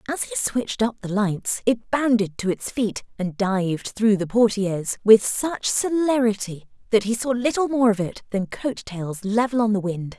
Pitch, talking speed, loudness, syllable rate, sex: 220 Hz, 195 wpm, -22 LUFS, 4.7 syllables/s, female